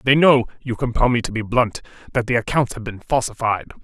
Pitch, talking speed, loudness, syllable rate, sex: 120 Hz, 190 wpm, -20 LUFS, 5.6 syllables/s, male